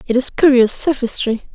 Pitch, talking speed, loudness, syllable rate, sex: 250 Hz, 155 wpm, -15 LUFS, 5.0 syllables/s, female